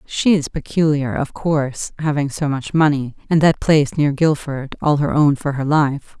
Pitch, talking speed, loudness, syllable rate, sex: 145 Hz, 185 wpm, -18 LUFS, 4.7 syllables/s, female